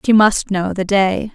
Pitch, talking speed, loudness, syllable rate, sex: 200 Hz, 225 wpm, -16 LUFS, 4.1 syllables/s, female